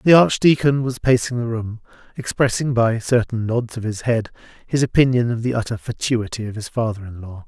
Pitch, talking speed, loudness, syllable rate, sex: 120 Hz, 195 wpm, -20 LUFS, 5.4 syllables/s, male